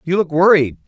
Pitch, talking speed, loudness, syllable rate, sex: 165 Hz, 205 wpm, -14 LUFS, 5.7 syllables/s, male